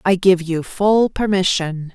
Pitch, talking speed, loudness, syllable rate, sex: 180 Hz, 155 wpm, -17 LUFS, 3.8 syllables/s, female